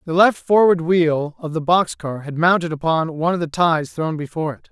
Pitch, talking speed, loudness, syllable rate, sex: 165 Hz, 230 wpm, -19 LUFS, 5.3 syllables/s, male